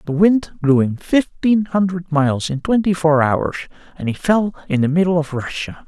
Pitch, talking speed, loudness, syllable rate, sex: 165 Hz, 195 wpm, -18 LUFS, 4.9 syllables/s, male